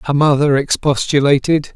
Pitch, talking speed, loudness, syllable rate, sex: 145 Hz, 105 wpm, -14 LUFS, 4.7 syllables/s, male